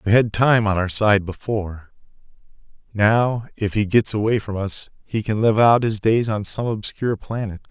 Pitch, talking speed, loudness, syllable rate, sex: 105 Hz, 185 wpm, -20 LUFS, 4.8 syllables/s, male